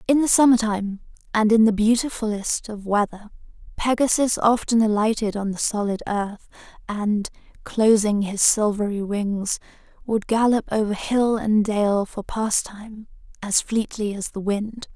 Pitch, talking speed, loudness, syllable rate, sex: 215 Hz, 140 wpm, -21 LUFS, 4.4 syllables/s, female